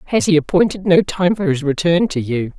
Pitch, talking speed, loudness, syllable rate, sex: 170 Hz, 230 wpm, -16 LUFS, 5.6 syllables/s, female